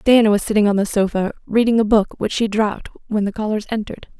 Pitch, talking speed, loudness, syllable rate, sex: 210 Hz, 230 wpm, -18 LUFS, 6.7 syllables/s, female